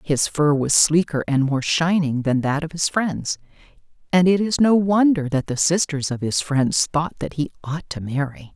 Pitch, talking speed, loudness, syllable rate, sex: 155 Hz, 205 wpm, -20 LUFS, 4.5 syllables/s, female